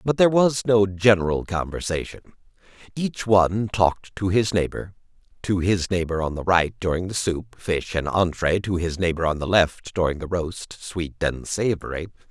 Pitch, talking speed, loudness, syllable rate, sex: 95 Hz, 175 wpm, -23 LUFS, 4.9 syllables/s, male